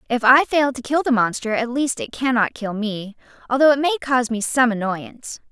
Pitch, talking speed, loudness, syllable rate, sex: 245 Hz, 230 wpm, -19 LUFS, 5.5 syllables/s, female